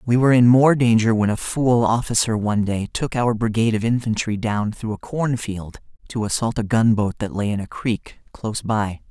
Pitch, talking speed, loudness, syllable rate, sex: 110 Hz, 205 wpm, -20 LUFS, 5.2 syllables/s, male